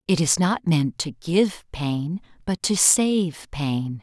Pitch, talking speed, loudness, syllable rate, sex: 165 Hz, 165 wpm, -22 LUFS, 3.1 syllables/s, female